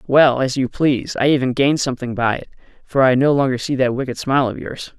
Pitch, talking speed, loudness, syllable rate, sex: 130 Hz, 240 wpm, -18 LUFS, 6.1 syllables/s, male